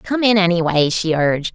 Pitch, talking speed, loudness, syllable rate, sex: 180 Hz, 195 wpm, -16 LUFS, 5.3 syllables/s, female